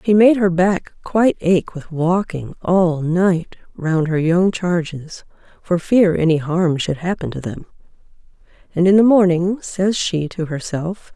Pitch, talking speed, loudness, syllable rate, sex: 175 Hz, 160 wpm, -17 LUFS, 4.1 syllables/s, female